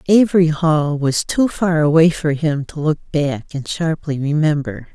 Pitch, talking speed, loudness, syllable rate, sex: 155 Hz, 170 wpm, -17 LUFS, 4.2 syllables/s, female